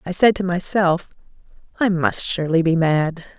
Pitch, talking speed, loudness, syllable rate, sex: 175 Hz, 160 wpm, -19 LUFS, 4.8 syllables/s, female